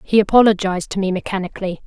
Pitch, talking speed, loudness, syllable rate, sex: 195 Hz, 160 wpm, -17 LUFS, 7.6 syllables/s, female